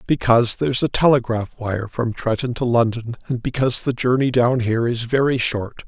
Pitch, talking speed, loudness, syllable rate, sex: 120 Hz, 185 wpm, -19 LUFS, 5.5 syllables/s, male